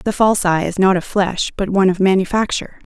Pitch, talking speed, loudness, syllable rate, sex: 190 Hz, 225 wpm, -16 LUFS, 6.4 syllables/s, female